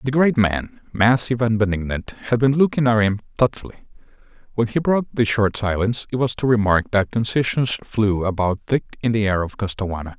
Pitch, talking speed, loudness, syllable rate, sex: 110 Hz, 190 wpm, -20 LUFS, 5.6 syllables/s, male